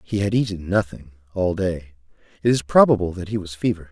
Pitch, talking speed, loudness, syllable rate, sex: 95 Hz, 200 wpm, -21 LUFS, 6.1 syllables/s, male